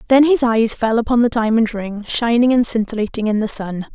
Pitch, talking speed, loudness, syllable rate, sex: 230 Hz, 215 wpm, -17 LUFS, 5.4 syllables/s, female